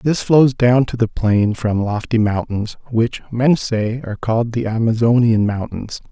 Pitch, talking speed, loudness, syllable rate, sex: 115 Hz, 165 wpm, -17 LUFS, 4.4 syllables/s, male